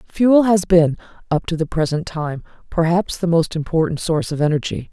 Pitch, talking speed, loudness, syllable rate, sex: 165 Hz, 185 wpm, -18 LUFS, 5.5 syllables/s, female